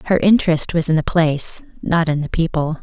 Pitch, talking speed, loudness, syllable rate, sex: 160 Hz, 215 wpm, -17 LUFS, 5.7 syllables/s, female